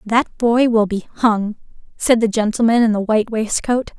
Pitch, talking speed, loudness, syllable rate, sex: 225 Hz, 180 wpm, -17 LUFS, 4.9 syllables/s, female